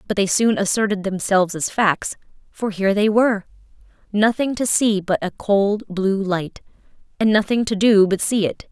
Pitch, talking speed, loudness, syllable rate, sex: 205 Hz, 170 wpm, -19 LUFS, 4.9 syllables/s, female